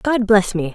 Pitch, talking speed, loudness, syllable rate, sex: 205 Hz, 240 wpm, -16 LUFS, 4.6 syllables/s, female